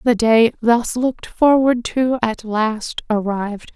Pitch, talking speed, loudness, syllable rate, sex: 230 Hz, 145 wpm, -18 LUFS, 3.8 syllables/s, female